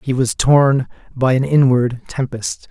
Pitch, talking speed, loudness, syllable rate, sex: 130 Hz, 155 wpm, -16 LUFS, 3.9 syllables/s, male